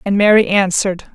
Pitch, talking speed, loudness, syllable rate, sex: 195 Hz, 155 wpm, -14 LUFS, 5.7 syllables/s, female